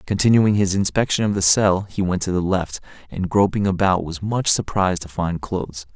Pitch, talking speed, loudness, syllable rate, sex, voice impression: 95 Hz, 200 wpm, -20 LUFS, 5.3 syllables/s, male, masculine, adult-like, fluent, cool, slightly refreshing, sincere, slightly calm